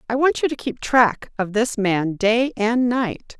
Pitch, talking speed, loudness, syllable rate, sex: 230 Hz, 210 wpm, -20 LUFS, 3.8 syllables/s, female